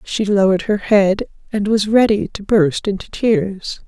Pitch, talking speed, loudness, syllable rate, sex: 200 Hz, 170 wpm, -16 LUFS, 4.3 syllables/s, female